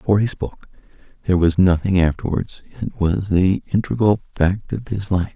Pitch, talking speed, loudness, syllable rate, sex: 95 Hz, 170 wpm, -19 LUFS, 5.6 syllables/s, male